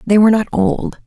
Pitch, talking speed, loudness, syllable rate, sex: 200 Hz, 225 wpm, -14 LUFS, 5.7 syllables/s, female